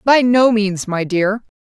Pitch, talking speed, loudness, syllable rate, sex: 210 Hz, 185 wpm, -15 LUFS, 3.6 syllables/s, female